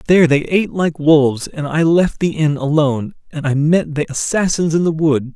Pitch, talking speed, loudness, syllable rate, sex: 155 Hz, 215 wpm, -16 LUFS, 5.2 syllables/s, male